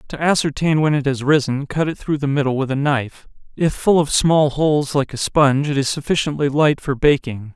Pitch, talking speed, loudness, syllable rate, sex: 145 Hz, 215 wpm, -18 LUFS, 5.5 syllables/s, male